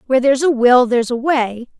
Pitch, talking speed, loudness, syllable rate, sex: 255 Hz, 235 wpm, -15 LUFS, 6.4 syllables/s, female